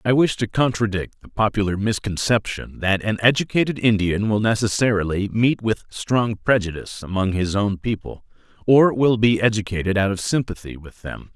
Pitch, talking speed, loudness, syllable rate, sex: 105 Hz, 160 wpm, -20 LUFS, 5.2 syllables/s, male